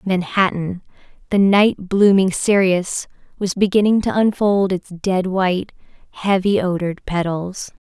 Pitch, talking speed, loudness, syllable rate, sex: 190 Hz, 115 wpm, -18 LUFS, 4.2 syllables/s, female